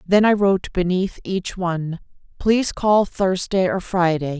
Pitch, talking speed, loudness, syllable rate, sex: 185 Hz, 150 wpm, -20 LUFS, 4.5 syllables/s, female